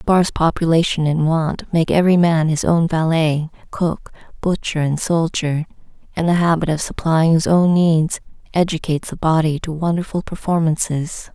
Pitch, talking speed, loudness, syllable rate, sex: 165 Hz, 155 wpm, -18 LUFS, 5.0 syllables/s, female